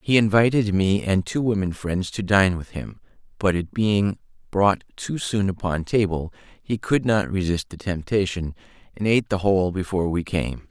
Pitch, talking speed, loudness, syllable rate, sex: 95 Hz, 180 wpm, -23 LUFS, 4.8 syllables/s, male